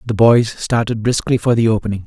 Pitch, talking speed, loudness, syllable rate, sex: 110 Hz, 205 wpm, -16 LUFS, 5.9 syllables/s, male